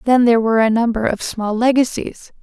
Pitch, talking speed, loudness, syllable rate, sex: 230 Hz, 200 wpm, -16 LUFS, 5.9 syllables/s, female